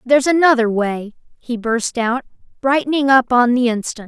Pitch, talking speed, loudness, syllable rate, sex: 245 Hz, 160 wpm, -16 LUFS, 5.0 syllables/s, female